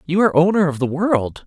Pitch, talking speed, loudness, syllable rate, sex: 170 Hz, 245 wpm, -17 LUFS, 5.9 syllables/s, male